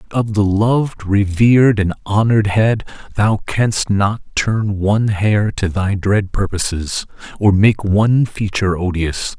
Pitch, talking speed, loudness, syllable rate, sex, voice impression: 105 Hz, 145 wpm, -16 LUFS, 4.3 syllables/s, male, masculine, middle-aged, tensed, powerful, slightly soft, clear, raspy, cool, calm, mature, friendly, reassuring, wild, lively, slightly strict